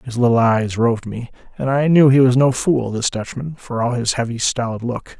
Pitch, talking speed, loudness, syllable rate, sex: 125 Hz, 230 wpm, -17 LUFS, 5.2 syllables/s, male